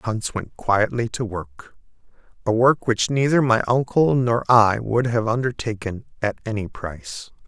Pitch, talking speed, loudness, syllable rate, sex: 115 Hz, 145 wpm, -21 LUFS, 4.3 syllables/s, male